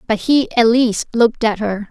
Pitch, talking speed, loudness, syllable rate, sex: 230 Hz, 220 wpm, -15 LUFS, 4.8 syllables/s, female